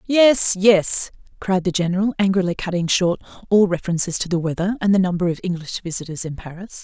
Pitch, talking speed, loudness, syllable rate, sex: 185 Hz, 185 wpm, -19 LUFS, 5.8 syllables/s, female